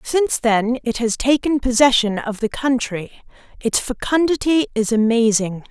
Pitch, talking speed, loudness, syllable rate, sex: 245 Hz, 135 wpm, -18 LUFS, 4.7 syllables/s, female